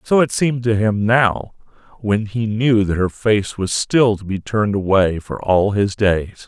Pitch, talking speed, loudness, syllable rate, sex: 105 Hz, 205 wpm, -17 LUFS, 4.2 syllables/s, male